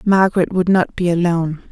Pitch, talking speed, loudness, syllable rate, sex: 175 Hz, 175 wpm, -16 LUFS, 5.8 syllables/s, female